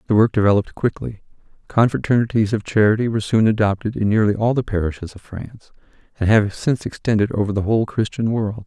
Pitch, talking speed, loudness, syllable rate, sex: 110 Hz, 180 wpm, -19 LUFS, 6.5 syllables/s, male